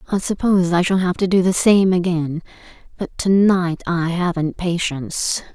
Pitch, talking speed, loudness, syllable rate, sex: 180 Hz, 175 wpm, -18 LUFS, 4.8 syllables/s, female